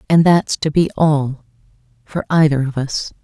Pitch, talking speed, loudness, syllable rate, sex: 150 Hz, 150 wpm, -16 LUFS, 4.4 syllables/s, female